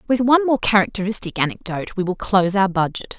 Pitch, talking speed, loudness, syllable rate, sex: 200 Hz, 190 wpm, -19 LUFS, 6.6 syllables/s, female